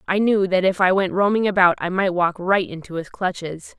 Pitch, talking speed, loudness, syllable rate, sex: 185 Hz, 240 wpm, -19 LUFS, 5.3 syllables/s, female